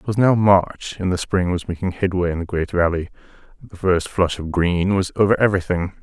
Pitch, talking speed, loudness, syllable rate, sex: 90 Hz, 220 wpm, -20 LUFS, 5.5 syllables/s, male